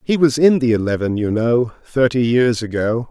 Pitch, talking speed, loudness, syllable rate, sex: 120 Hz, 195 wpm, -17 LUFS, 4.8 syllables/s, male